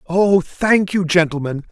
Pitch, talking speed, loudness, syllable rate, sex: 175 Hz, 140 wpm, -16 LUFS, 4.1 syllables/s, male